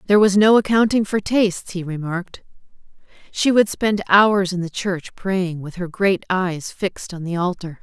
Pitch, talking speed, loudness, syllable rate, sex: 190 Hz, 185 wpm, -19 LUFS, 4.8 syllables/s, female